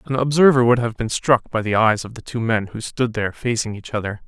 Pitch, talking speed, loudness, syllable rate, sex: 115 Hz, 265 wpm, -19 LUFS, 5.9 syllables/s, male